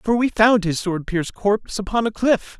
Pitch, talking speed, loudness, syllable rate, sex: 205 Hz, 230 wpm, -20 LUFS, 5.2 syllables/s, male